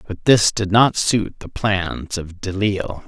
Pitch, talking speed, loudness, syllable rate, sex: 100 Hz, 175 wpm, -19 LUFS, 3.9 syllables/s, male